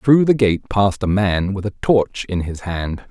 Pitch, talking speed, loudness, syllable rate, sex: 100 Hz, 230 wpm, -18 LUFS, 4.3 syllables/s, male